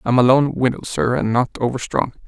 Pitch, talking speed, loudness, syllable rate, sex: 125 Hz, 240 wpm, -18 LUFS, 5.5 syllables/s, male